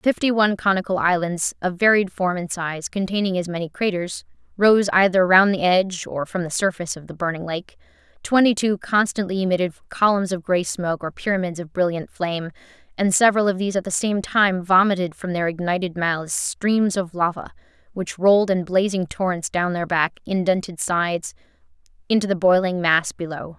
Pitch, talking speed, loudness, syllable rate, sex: 185 Hz, 180 wpm, -21 LUFS, 5.4 syllables/s, female